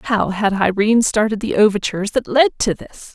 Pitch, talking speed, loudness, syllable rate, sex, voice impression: 210 Hz, 190 wpm, -17 LUFS, 5.3 syllables/s, female, feminine, middle-aged, tensed, powerful, hard, fluent, intellectual, slightly friendly, unique, lively, intense, slightly light